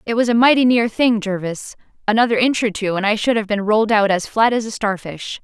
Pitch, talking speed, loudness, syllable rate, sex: 215 Hz, 255 wpm, -17 LUFS, 5.8 syllables/s, female